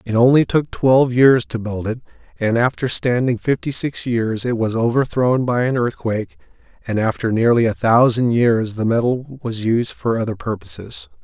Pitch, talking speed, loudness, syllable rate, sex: 120 Hz, 175 wpm, -18 LUFS, 4.8 syllables/s, male